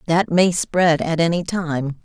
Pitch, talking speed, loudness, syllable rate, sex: 165 Hz, 175 wpm, -18 LUFS, 3.8 syllables/s, female